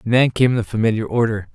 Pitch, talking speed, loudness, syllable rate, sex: 115 Hz, 195 wpm, -18 LUFS, 5.6 syllables/s, male